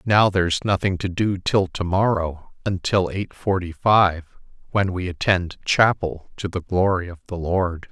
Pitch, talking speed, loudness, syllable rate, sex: 95 Hz, 165 wpm, -21 LUFS, 4.2 syllables/s, male